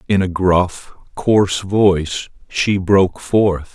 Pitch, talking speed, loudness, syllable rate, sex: 95 Hz, 130 wpm, -16 LUFS, 3.5 syllables/s, male